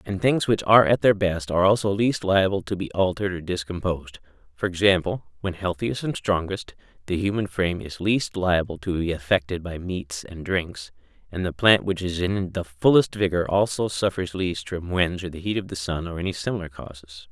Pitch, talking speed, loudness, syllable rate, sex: 90 Hz, 205 wpm, -24 LUFS, 5.3 syllables/s, male